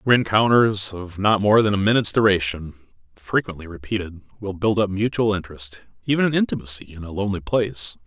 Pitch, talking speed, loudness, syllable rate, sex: 100 Hz, 165 wpm, -21 LUFS, 5.9 syllables/s, male